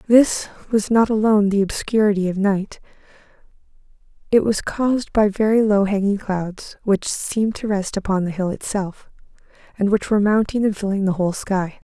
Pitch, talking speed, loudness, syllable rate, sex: 205 Hz, 165 wpm, -20 LUFS, 5.2 syllables/s, female